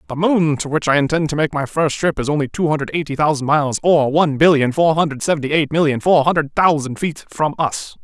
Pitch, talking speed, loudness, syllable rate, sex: 150 Hz, 240 wpm, -17 LUFS, 6.0 syllables/s, male